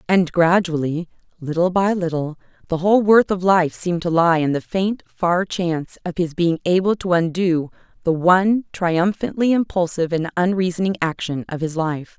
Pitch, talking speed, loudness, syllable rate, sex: 175 Hz, 165 wpm, -19 LUFS, 4.9 syllables/s, female